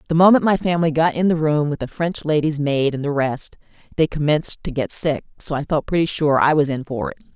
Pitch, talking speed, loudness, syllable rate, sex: 155 Hz, 255 wpm, -19 LUFS, 5.9 syllables/s, female